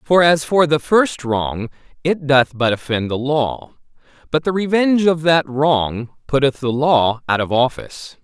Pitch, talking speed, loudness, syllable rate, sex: 140 Hz, 175 wpm, -17 LUFS, 4.2 syllables/s, male